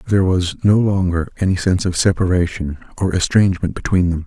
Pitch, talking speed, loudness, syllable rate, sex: 90 Hz, 170 wpm, -17 LUFS, 5.8 syllables/s, male